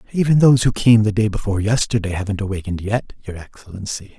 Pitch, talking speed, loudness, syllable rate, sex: 105 Hz, 185 wpm, -18 LUFS, 6.8 syllables/s, male